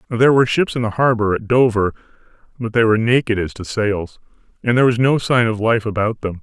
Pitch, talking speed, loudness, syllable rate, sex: 115 Hz, 225 wpm, -17 LUFS, 6.2 syllables/s, male